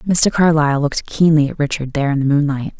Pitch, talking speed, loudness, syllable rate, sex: 150 Hz, 215 wpm, -16 LUFS, 6.5 syllables/s, female